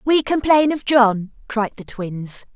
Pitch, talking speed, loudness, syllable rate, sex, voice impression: 240 Hz, 165 wpm, -19 LUFS, 3.7 syllables/s, female, feminine, slightly adult-like, slightly soft, slightly cute, calm, slightly friendly